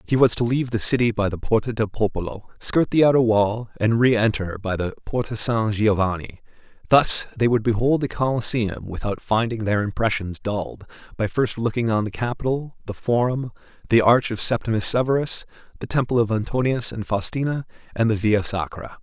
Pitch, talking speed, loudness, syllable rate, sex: 115 Hz, 175 wpm, -22 LUFS, 5.4 syllables/s, male